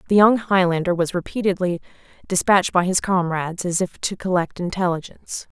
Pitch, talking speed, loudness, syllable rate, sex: 180 Hz, 150 wpm, -20 LUFS, 5.8 syllables/s, female